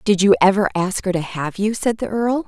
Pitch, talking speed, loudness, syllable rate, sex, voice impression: 200 Hz, 265 wpm, -18 LUFS, 5.3 syllables/s, female, feminine, middle-aged, tensed, soft, clear, fluent, intellectual, calm, reassuring, elegant, slightly kind